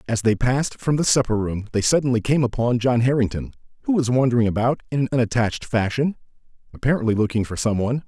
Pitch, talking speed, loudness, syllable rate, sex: 120 Hz, 195 wpm, -21 LUFS, 6.6 syllables/s, male